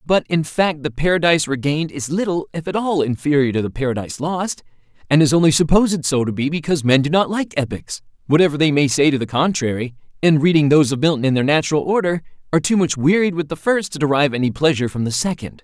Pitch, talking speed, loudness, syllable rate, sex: 150 Hz, 225 wpm, -18 LUFS, 6.7 syllables/s, male